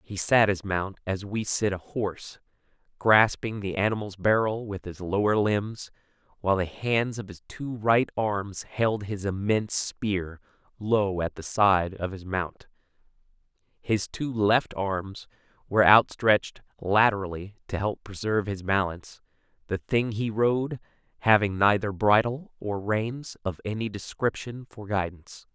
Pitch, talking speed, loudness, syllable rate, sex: 105 Hz, 145 wpm, -26 LUFS, 4.3 syllables/s, male